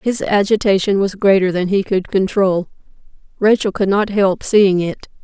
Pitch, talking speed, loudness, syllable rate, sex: 195 Hz, 160 wpm, -16 LUFS, 4.7 syllables/s, female